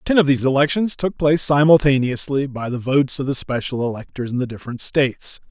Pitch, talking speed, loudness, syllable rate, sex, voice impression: 135 Hz, 195 wpm, -19 LUFS, 6.2 syllables/s, male, masculine, adult-like, tensed, powerful, slightly hard, clear, cool, calm, slightly mature, friendly, wild, lively, slightly strict